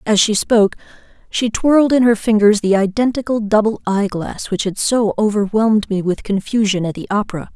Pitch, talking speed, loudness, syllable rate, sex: 210 Hz, 185 wpm, -16 LUFS, 5.5 syllables/s, female